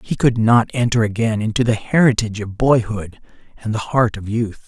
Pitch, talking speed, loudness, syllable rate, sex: 115 Hz, 190 wpm, -18 LUFS, 5.3 syllables/s, male